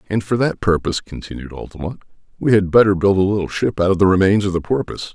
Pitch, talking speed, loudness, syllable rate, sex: 95 Hz, 235 wpm, -17 LUFS, 6.8 syllables/s, male